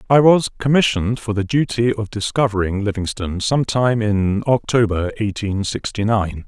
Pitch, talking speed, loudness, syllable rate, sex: 110 Hz, 140 wpm, -18 LUFS, 5.3 syllables/s, male